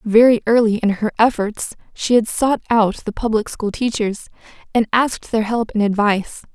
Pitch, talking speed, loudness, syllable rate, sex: 220 Hz, 175 wpm, -18 LUFS, 4.9 syllables/s, female